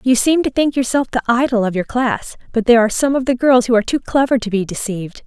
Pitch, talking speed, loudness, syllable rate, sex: 240 Hz, 275 wpm, -16 LUFS, 6.5 syllables/s, female